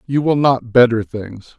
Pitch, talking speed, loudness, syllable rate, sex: 120 Hz, 190 wpm, -15 LUFS, 4.2 syllables/s, male